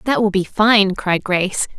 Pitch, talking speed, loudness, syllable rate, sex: 200 Hz, 200 wpm, -16 LUFS, 4.5 syllables/s, female